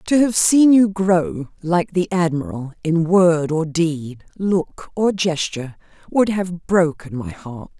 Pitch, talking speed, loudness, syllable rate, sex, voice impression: 170 Hz, 155 wpm, -18 LUFS, 3.6 syllables/s, female, feminine, slightly gender-neutral, middle-aged, slightly relaxed, powerful, slightly hard, slightly muffled, raspy, intellectual, calm, elegant, lively, strict, sharp